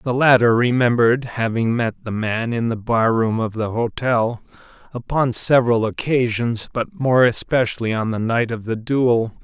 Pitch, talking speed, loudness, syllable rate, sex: 120 Hz, 165 wpm, -19 LUFS, 4.7 syllables/s, male